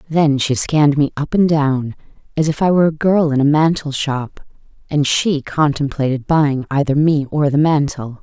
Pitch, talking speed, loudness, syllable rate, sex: 145 Hz, 190 wpm, -16 LUFS, 4.8 syllables/s, female